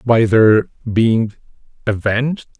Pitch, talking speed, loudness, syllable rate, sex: 115 Hz, 95 wpm, -16 LUFS, 3.2 syllables/s, male